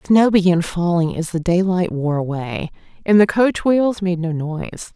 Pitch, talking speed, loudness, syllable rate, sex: 180 Hz, 180 wpm, -18 LUFS, 4.7 syllables/s, female